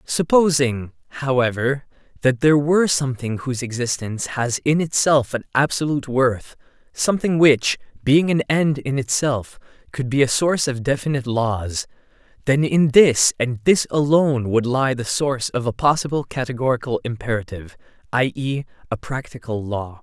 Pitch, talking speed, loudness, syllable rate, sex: 130 Hz, 145 wpm, -20 LUFS, 5.1 syllables/s, male